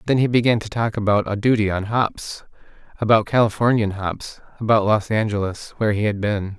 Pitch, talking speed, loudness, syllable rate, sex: 105 Hz, 180 wpm, -20 LUFS, 5.5 syllables/s, male